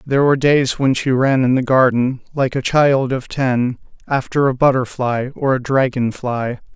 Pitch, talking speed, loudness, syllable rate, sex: 130 Hz, 185 wpm, -17 LUFS, 4.6 syllables/s, male